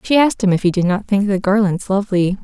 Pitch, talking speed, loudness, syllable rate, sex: 200 Hz, 270 wpm, -16 LUFS, 6.5 syllables/s, female